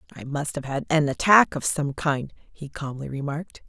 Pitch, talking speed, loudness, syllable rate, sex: 145 Hz, 195 wpm, -24 LUFS, 4.8 syllables/s, female